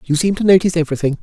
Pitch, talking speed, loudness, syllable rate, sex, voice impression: 170 Hz, 245 wpm, -15 LUFS, 8.9 syllables/s, male, very masculine, very adult-like, slightly old, slightly thick, slightly relaxed, slightly weak, slightly bright, soft, muffled, slightly fluent, raspy, cool, very intellectual, very sincere, very calm, very mature, friendly, very reassuring, unique, slightly elegant, wild, slightly sweet, lively, kind, slightly modest